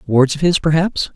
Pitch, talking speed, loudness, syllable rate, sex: 155 Hz, 210 wpm, -16 LUFS, 5.0 syllables/s, male